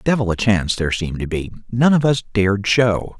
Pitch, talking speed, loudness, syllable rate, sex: 105 Hz, 225 wpm, -18 LUFS, 6.1 syllables/s, male